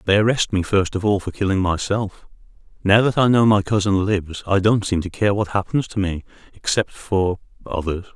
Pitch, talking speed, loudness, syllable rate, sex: 100 Hz, 200 wpm, -20 LUFS, 5.3 syllables/s, male